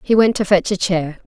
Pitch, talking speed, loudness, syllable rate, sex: 190 Hz, 280 wpm, -17 LUFS, 5.3 syllables/s, female